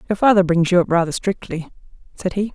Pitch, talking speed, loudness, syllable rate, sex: 185 Hz, 210 wpm, -18 LUFS, 6.2 syllables/s, female